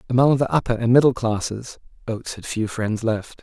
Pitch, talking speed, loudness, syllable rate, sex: 120 Hz, 195 wpm, -21 LUFS, 5.4 syllables/s, male